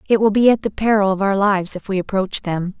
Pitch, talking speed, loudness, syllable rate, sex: 200 Hz, 280 wpm, -18 LUFS, 6.2 syllables/s, female